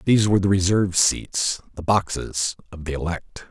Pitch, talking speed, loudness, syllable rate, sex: 90 Hz, 170 wpm, -22 LUFS, 5.3 syllables/s, male